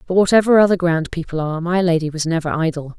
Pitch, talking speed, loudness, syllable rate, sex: 170 Hz, 220 wpm, -17 LUFS, 6.7 syllables/s, female